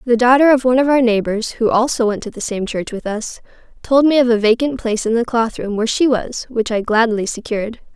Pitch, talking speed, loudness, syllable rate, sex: 235 Hz, 250 wpm, -16 LUFS, 5.9 syllables/s, female